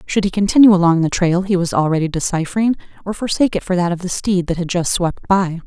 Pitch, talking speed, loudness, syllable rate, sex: 180 Hz, 245 wpm, -16 LUFS, 6.3 syllables/s, female